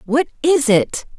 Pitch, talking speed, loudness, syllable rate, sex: 200 Hz, 150 wpm, -17 LUFS, 3.8 syllables/s, female